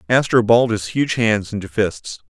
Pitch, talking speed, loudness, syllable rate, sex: 110 Hz, 180 wpm, -18 LUFS, 4.8 syllables/s, male